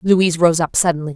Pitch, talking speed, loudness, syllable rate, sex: 170 Hz, 210 wpm, -16 LUFS, 6.7 syllables/s, female